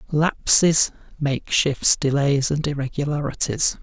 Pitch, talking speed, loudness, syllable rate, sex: 140 Hz, 80 wpm, -20 LUFS, 4.2 syllables/s, male